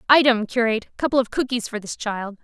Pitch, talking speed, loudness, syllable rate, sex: 235 Hz, 195 wpm, -21 LUFS, 6.1 syllables/s, female